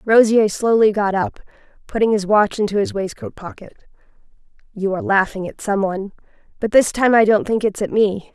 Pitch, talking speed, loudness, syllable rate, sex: 210 Hz, 180 wpm, -18 LUFS, 5.3 syllables/s, female